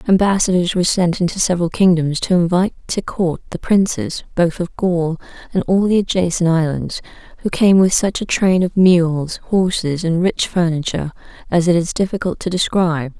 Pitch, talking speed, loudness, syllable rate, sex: 175 Hz, 175 wpm, -17 LUFS, 5.2 syllables/s, female